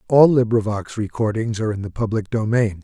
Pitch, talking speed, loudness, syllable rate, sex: 110 Hz, 170 wpm, -20 LUFS, 5.7 syllables/s, male